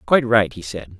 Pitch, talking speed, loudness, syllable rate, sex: 105 Hz, 240 wpm, -18 LUFS, 5.8 syllables/s, male